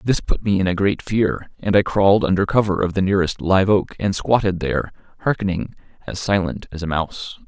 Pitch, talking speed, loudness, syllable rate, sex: 95 Hz, 210 wpm, -20 LUFS, 5.7 syllables/s, male